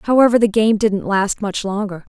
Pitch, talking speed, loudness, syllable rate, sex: 210 Hz, 195 wpm, -17 LUFS, 4.9 syllables/s, female